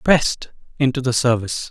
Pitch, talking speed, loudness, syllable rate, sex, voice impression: 130 Hz, 140 wpm, -19 LUFS, 5.8 syllables/s, male, very masculine, very adult-like, slightly thick, slightly refreshing, slightly sincere